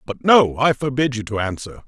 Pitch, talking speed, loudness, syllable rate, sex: 125 Hz, 225 wpm, -18 LUFS, 5.1 syllables/s, male